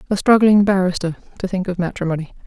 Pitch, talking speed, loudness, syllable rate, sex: 185 Hz, 170 wpm, -17 LUFS, 6.6 syllables/s, female